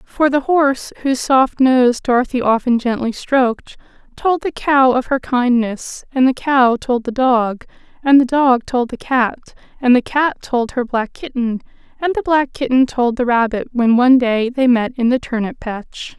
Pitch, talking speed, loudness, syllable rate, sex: 255 Hz, 190 wpm, -16 LUFS, 4.5 syllables/s, female